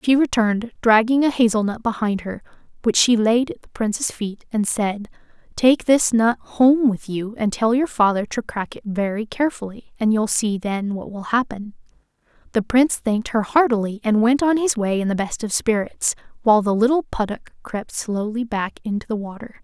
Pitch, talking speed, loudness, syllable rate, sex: 225 Hz, 195 wpm, -20 LUFS, 5.0 syllables/s, female